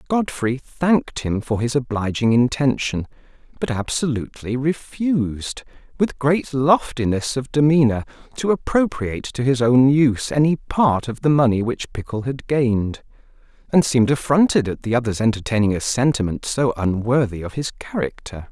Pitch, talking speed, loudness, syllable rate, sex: 130 Hz, 145 wpm, -20 LUFS, 4.9 syllables/s, male